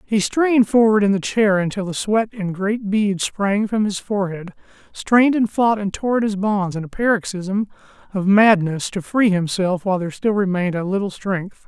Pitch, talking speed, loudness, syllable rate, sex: 200 Hz, 200 wpm, -19 LUFS, 5.0 syllables/s, male